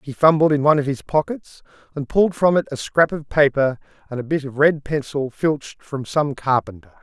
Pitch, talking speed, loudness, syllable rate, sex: 145 Hz, 215 wpm, -20 LUFS, 5.4 syllables/s, male